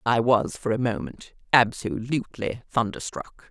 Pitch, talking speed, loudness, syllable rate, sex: 120 Hz, 120 wpm, -25 LUFS, 4.4 syllables/s, female